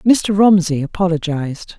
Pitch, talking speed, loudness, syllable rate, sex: 175 Hz, 100 wpm, -16 LUFS, 4.6 syllables/s, female